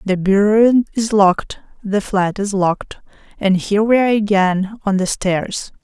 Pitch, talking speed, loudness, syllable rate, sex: 200 Hz, 165 wpm, -16 LUFS, 4.6 syllables/s, female